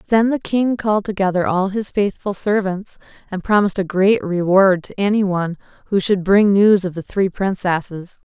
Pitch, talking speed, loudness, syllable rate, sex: 195 Hz, 180 wpm, -17 LUFS, 5.0 syllables/s, female